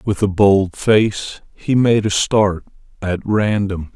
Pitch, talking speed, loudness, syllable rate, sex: 100 Hz, 150 wpm, -16 LUFS, 3.3 syllables/s, male